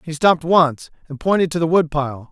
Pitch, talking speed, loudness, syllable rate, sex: 160 Hz, 235 wpm, -17 LUFS, 5.4 syllables/s, male